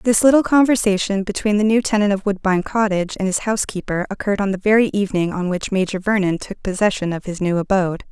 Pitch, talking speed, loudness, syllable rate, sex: 200 Hz, 205 wpm, -18 LUFS, 6.6 syllables/s, female